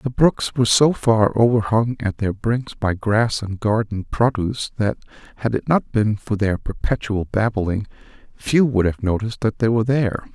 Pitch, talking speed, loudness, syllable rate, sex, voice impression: 110 Hz, 180 wpm, -20 LUFS, 4.8 syllables/s, male, very masculine, very adult-like, very old, very relaxed, weak, slightly bright, very soft, very muffled, slightly halting, raspy, very cool, intellectual, sincere, very calm, very mature, very friendly, reassuring, very unique, very elegant, wild, sweet, lively, very kind, modest, slightly light